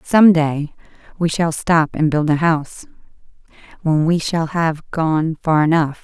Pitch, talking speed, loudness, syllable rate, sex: 160 Hz, 160 wpm, -17 LUFS, 4.0 syllables/s, female